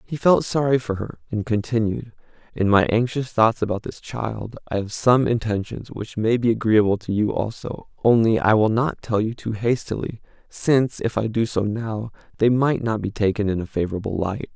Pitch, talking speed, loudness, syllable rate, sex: 110 Hz, 200 wpm, -22 LUFS, 5.0 syllables/s, male